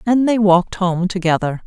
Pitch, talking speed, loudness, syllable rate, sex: 195 Hz, 180 wpm, -16 LUFS, 5.2 syllables/s, female